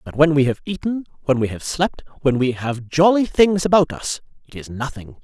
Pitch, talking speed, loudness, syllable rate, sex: 150 Hz, 205 wpm, -19 LUFS, 5.2 syllables/s, male